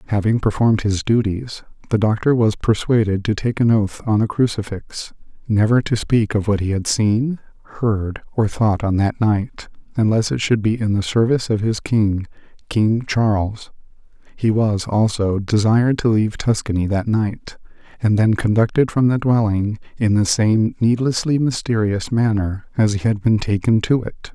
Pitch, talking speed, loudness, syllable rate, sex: 110 Hz, 170 wpm, -18 LUFS, 4.7 syllables/s, male